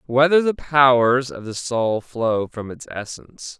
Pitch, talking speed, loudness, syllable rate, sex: 125 Hz, 165 wpm, -19 LUFS, 4.1 syllables/s, male